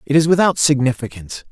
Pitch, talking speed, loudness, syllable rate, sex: 140 Hz, 160 wpm, -15 LUFS, 6.7 syllables/s, male